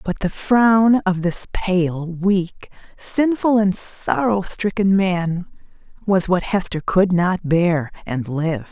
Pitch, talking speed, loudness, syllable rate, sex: 185 Hz, 140 wpm, -19 LUFS, 3.4 syllables/s, female